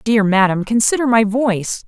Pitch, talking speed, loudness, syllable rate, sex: 220 Hz, 160 wpm, -15 LUFS, 5.0 syllables/s, female